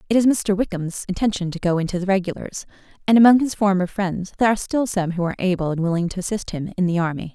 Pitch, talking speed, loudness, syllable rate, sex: 190 Hz, 245 wpm, -21 LUFS, 6.9 syllables/s, female